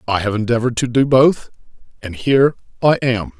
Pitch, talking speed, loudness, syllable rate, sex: 120 Hz, 175 wpm, -16 LUFS, 5.9 syllables/s, male